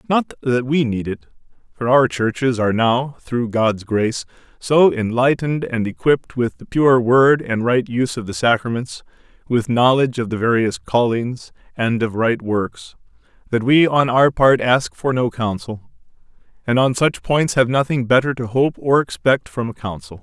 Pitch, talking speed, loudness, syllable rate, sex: 120 Hz, 180 wpm, -18 LUFS, 4.7 syllables/s, male